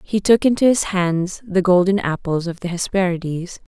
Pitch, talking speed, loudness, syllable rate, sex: 185 Hz, 175 wpm, -18 LUFS, 4.8 syllables/s, female